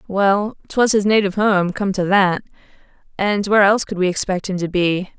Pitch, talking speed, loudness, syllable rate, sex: 195 Hz, 195 wpm, -17 LUFS, 5.4 syllables/s, female